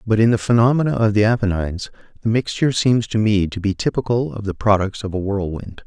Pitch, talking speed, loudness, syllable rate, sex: 105 Hz, 215 wpm, -19 LUFS, 6.1 syllables/s, male